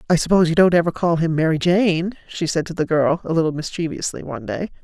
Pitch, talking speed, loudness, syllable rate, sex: 165 Hz, 235 wpm, -19 LUFS, 6.4 syllables/s, female